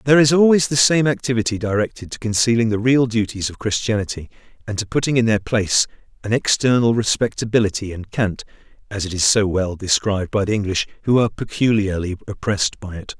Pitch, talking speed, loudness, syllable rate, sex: 110 Hz, 180 wpm, -19 LUFS, 6.1 syllables/s, male